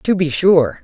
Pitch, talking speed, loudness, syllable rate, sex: 170 Hz, 215 wpm, -14 LUFS, 3.8 syllables/s, female